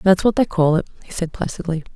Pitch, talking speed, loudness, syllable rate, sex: 175 Hz, 245 wpm, -20 LUFS, 6.4 syllables/s, female